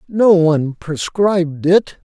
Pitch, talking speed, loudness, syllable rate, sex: 170 Hz, 115 wpm, -15 LUFS, 3.7 syllables/s, male